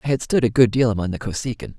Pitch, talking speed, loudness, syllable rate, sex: 110 Hz, 300 wpm, -20 LUFS, 7.1 syllables/s, male